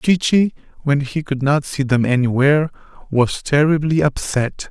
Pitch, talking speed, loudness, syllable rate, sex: 145 Hz, 155 wpm, -18 LUFS, 4.5 syllables/s, male